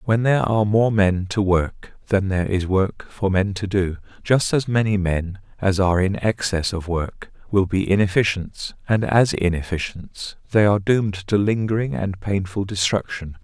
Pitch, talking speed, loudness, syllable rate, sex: 100 Hz, 175 wpm, -21 LUFS, 4.8 syllables/s, male